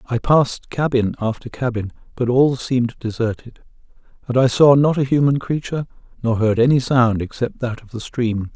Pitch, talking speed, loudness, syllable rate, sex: 125 Hz, 175 wpm, -19 LUFS, 5.2 syllables/s, male